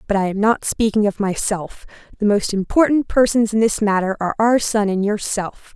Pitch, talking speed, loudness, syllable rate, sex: 210 Hz, 200 wpm, -18 LUFS, 5.2 syllables/s, female